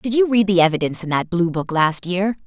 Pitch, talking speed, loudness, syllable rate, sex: 185 Hz, 245 wpm, -18 LUFS, 6.0 syllables/s, female